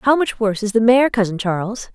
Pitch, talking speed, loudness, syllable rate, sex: 225 Hz, 245 wpm, -17 LUFS, 5.8 syllables/s, female